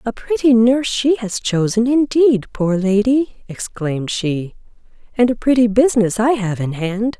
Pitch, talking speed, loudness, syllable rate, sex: 225 Hz, 160 wpm, -16 LUFS, 4.5 syllables/s, female